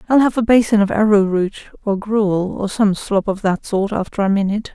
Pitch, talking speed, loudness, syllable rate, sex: 205 Hz, 225 wpm, -17 LUFS, 5.2 syllables/s, female